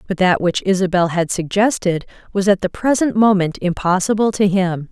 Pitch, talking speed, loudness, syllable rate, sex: 190 Hz, 170 wpm, -17 LUFS, 5.2 syllables/s, female